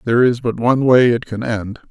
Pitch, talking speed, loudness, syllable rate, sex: 120 Hz, 250 wpm, -16 LUFS, 5.9 syllables/s, male